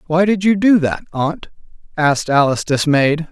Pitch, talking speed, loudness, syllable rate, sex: 160 Hz, 165 wpm, -16 LUFS, 5.0 syllables/s, male